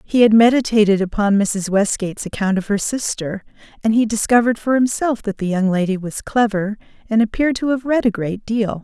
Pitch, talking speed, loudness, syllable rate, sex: 215 Hz, 195 wpm, -18 LUFS, 5.6 syllables/s, female